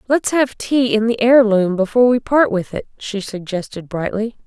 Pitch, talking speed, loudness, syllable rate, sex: 220 Hz, 190 wpm, -17 LUFS, 4.8 syllables/s, female